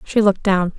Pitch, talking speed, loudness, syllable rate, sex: 195 Hz, 230 wpm, -17 LUFS, 6.0 syllables/s, female